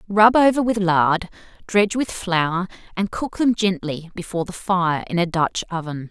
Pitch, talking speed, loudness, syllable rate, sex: 185 Hz, 175 wpm, -20 LUFS, 4.7 syllables/s, female